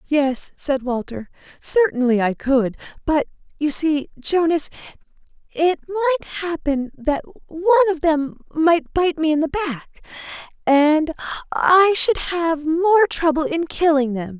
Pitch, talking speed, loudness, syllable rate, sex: 310 Hz, 135 wpm, -19 LUFS, 4.0 syllables/s, female